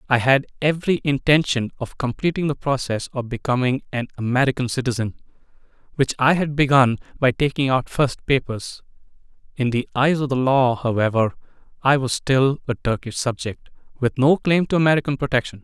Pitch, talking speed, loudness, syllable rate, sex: 130 Hz, 155 wpm, -20 LUFS, 5.4 syllables/s, male